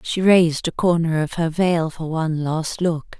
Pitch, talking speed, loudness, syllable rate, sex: 165 Hz, 205 wpm, -20 LUFS, 4.5 syllables/s, female